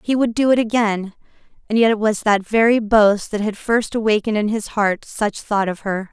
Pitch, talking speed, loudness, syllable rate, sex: 215 Hz, 225 wpm, -18 LUFS, 5.1 syllables/s, female